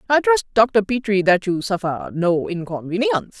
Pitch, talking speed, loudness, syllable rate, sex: 185 Hz, 160 wpm, -19 LUFS, 4.8 syllables/s, female